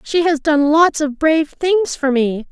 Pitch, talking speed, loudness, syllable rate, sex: 305 Hz, 215 wpm, -15 LUFS, 4.2 syllables/s, female